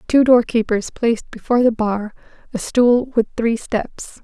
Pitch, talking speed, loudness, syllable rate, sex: 235 Hz, 155 wpm, -18 LUFS, 4.5 syllables/s, female